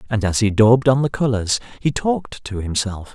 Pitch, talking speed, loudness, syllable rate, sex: 115 Hz, 210 wpm, -19 LUFS, 5.5 syllables/s, male